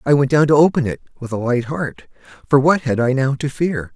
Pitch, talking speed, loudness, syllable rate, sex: 135 Hz, 245 wpm, -17 LUFS, 5.6 syllables/s, male